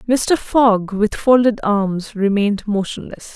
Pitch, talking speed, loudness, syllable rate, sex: 215 Hz, 125 wpm, -17 LUFS, 3.8 syllables/s, female